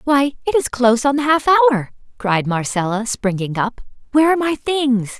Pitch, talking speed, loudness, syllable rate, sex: 255 Hz, 185 wpm, -17 LUFS, 5.4 syllables/s, female